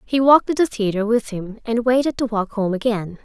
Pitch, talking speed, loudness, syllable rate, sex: 225 Hz, 240 wpm, -19 LUFS, 5.6 syllables/s, female